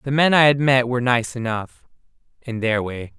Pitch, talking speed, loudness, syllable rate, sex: 125 Hz, 190 wpm, -19 LUFS, 5.2 syllables/s, male